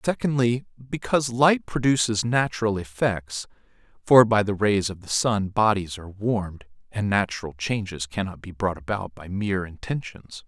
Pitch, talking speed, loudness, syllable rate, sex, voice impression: 105 Hz, 150 wpm, -24 LUFS, 4.9 syllables/s, male, masculine, adult-like, clear, slightly refreshing, sincere, friendly